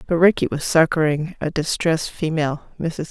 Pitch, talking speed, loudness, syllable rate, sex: 160 Hz, 135 wpm, -20 LUFS, 5.3 syllables/s, female